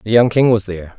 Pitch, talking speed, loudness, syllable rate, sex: 110 Hz, 305 wpm, -14 LUFS, 6.3 syllables/s, male